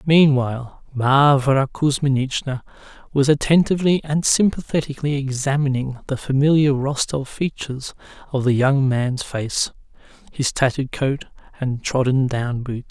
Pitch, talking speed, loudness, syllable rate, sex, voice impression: 135 Hz, 110 wpm, -20 LUFS, 4.7 syllables/s, male, very masculine, slightly old, thick, tensed, powerful, bright, soft, clear, slightly halting, slightly raspy, slightly cool, intellectual, refreshing, very sincere, very calm, mature, friendly, slightly reassuring, slightly unique, slightly elegant, wild, slightly sweet, lively, kind, slightly modest